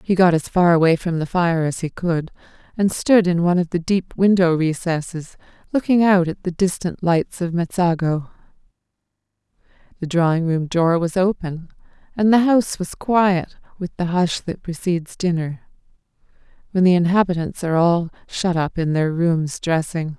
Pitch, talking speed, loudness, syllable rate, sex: 170 Hz, 165 wpm, -19 LUFS, 4.9 syllables/s, female